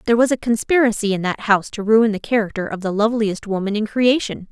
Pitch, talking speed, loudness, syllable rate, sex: 215 Hz, 225 wpm, -18 LUFS, 6.4 syllables/s, female